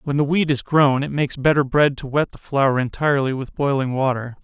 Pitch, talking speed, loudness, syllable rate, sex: 140 Hz, 230 wpm, -20 LUFS, 5.6 syllables/s, male